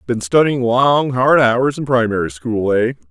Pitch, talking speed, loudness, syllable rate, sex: 120 Hz, 175 wpm, -15 LUFS, 4.3 syllables/s, male